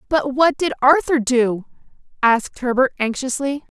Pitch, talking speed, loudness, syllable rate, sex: 260 Hz, 125 wpm, -18 LUFS, 4.6 syllables/s, female